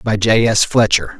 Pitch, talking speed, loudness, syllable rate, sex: 110 Hz, 200 wpm, -14 LUFS, 4.4 syllables/s, male